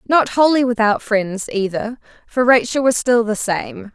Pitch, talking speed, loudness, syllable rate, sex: 230 Hz, 165 wpm, -17 LUFS, 4.3 syllables/s, female